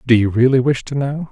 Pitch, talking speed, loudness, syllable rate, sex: 130 Hz, 275 wpm, -16 LUFS, 5.9 syllables/s, male